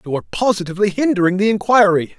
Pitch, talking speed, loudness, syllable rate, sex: 195 Hz, 165 wpm, -16 LUFS, 7.5 syllables/s, male